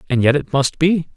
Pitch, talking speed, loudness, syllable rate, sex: 150 Hz, 260 wpm, -17 LUFS, 5.5 syllables/s, male